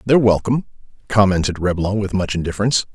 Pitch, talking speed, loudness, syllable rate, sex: 100 Hz, 145 wpm, -18 LUFS, 7.3 syllables/s, male